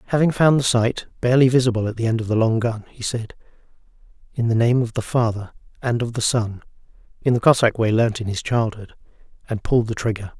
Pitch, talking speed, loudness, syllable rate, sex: 115 Hz, 215 wpm, -20 LUFS, 6.3 syllables/s, male